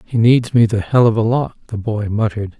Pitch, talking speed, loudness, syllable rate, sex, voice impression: 110 Hz, 255 wpm, -16 LUFS, 5.8 syllables/s, male, masculine, very adult-like, sincere, calm, slightly kind